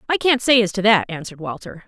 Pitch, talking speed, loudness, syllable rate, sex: 215 Hz, 255 wpm, -17 LUFS, 6.6 syllables/s, female